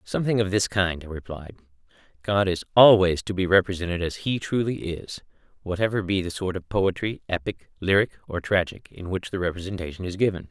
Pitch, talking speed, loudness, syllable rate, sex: 95 Hz, 175 wpm, -24 LUFS, 5.7 syllables/s, male